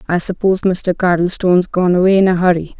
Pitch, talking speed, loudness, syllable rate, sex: 180 Hz, 195 wpm, -14 LUFS, 6.2 syllables/s, female